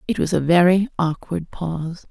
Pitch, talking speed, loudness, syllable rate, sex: 170 Hz, 170 wpm, -20 LUFS, 5.0 syllables/s, female